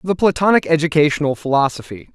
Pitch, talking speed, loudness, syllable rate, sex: 155 Hz, 110 wpm, -16 LUFS, 6.3 syllables/s, male